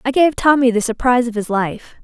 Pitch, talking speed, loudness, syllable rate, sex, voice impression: 245 Hz, 235 wpm, -16 LUFS, 5.9 syllables/s, female, feminine, slightly adult-like, slightly clear, slightly fluent, slightly cute, slightly refreshing, friendly, kind